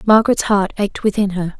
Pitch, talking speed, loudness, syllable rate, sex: 200 Hz, 190 wpm, -17 LUFS, 5.6 syllables/s, female